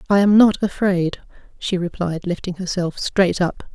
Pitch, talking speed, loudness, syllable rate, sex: 185 Hz, 160 wpm, -19 LUFS, 4.6 syllables/s, female